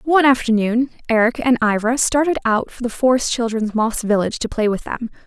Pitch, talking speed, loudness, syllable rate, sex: 235 Hz, 195 wpm, -18 LUFS, 5.7 syllables/s, female